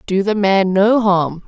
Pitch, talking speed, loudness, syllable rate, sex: 195 Hz, 205 wpm, -15 LUFS, 3.8 syllables/s, female